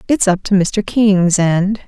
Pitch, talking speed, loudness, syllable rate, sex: 195 Hz, 190 wpm, -14 LUFS, 3.7 syllables/s, female